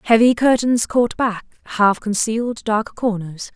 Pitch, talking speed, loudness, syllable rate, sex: 220 Hz, 135 wpm, -18 LUFS, 4.1 syllables/s, female